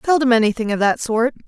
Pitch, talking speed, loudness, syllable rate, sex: 240 Hz, 205 wpm, -17 LUFS, 6.5 syllables/s, female